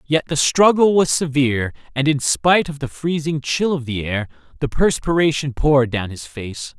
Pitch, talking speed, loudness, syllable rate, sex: 140 Hz, 185 wpm, -18 LUFS, 4.9 syllables/s, male